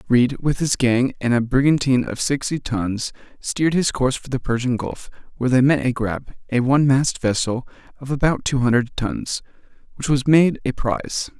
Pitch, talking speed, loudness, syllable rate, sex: 130 Hz, 190 wpm, -20 LUFS, 4.9 syllables/s, male